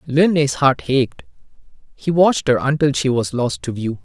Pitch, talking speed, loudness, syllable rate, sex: 135 Hz, 180 wpm, -18 LUFS, 4.8 syllables/s, male